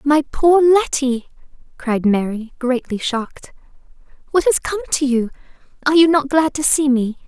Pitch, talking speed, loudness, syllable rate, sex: 270 Hz, 155 wpm, -17 LUFS, 4.8 syllables/s, female